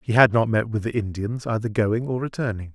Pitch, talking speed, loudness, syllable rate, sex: 110 Hz, 240 wpm, -23 LUFS, 5.7 syllables/s, male